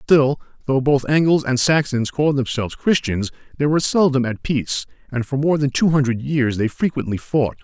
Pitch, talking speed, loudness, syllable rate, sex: 135 Hz, 190 wpm, -19 LUFS, 5.3 syllables/s, male